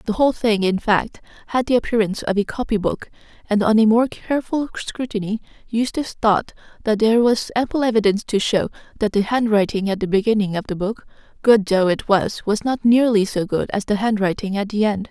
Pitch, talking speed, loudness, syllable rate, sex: 215 Hz, 205 wpm, -19 LUFS, 5.8 syllables/s, female